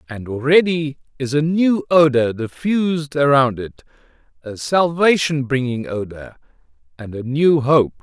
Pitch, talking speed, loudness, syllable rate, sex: 135 Hz, 120 wpm, -17 LUFS, 4.2 syllables/s, male